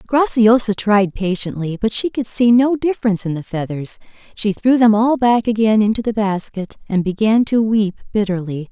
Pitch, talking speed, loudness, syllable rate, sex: 215 Hz, 180 wpm, -17 LUFS, 5.1 syllables/s, female